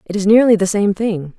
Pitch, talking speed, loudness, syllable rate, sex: 200 Hz, 260 wpm, -14 LUFS, 5.6 syllables/s, female